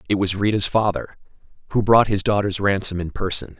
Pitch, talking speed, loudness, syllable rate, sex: 100 Hz, 185 wpm, -20 LUFS, 5.6 syllables/s, male